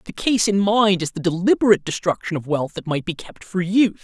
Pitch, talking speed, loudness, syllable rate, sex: 185 Hz, 240 wpm, -20 LUFS, 5.9 syllables/s, male